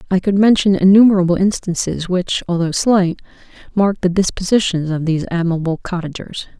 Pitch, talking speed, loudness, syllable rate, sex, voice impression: 185 Hz, 135 wpm, -16 LUFS, 5.7 syllables/s, female, feminine, adult-like, slightly relaxed, weak, dark, slightly soft, fluent, intellectual, calm, elegant, sharp, modest